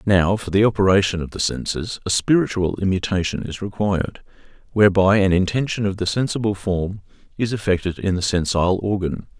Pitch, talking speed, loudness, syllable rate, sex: 100 Hz, 160 wpm, -20 LUFS, 5.7 syllables/s, male